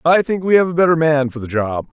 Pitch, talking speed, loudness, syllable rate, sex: 155 Hz, 335 wpm, -16 LUFS, 6.7 syllables/s, male